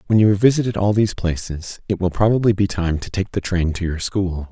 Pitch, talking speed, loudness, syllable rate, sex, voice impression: 95 Hz, 250 wpm, -19 LUFS, 5.9 syllables/s, male, very masculine, very adult-like, very middle-aged, very thick, tensed, slightly weak, bright, dark, hard, slightly muffled, fluent, cool, very intellectual, refreshing, very sincere, calm, mature, friendly, very reassuring, very unique, elegant, wild, sweet, slightly lively, very kind, modest